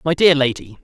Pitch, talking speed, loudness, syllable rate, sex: 145 Hz, 215 wpm, -16 LUFS, 5.6 syllables/s, male